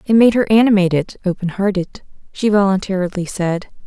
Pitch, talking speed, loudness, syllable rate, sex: 195 Hz, 110 wpm, -16 LUFS, 5.5 syllables/s, female